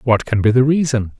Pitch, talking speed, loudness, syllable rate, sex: 120 Hz, 250 wpm, -15 LUFS, 5.6 syllables/s, male